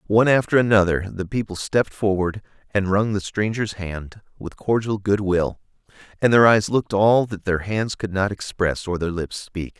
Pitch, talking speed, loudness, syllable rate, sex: 100 Hz, 190 wpm, -21 LUFS, 4.9 syllables/s, male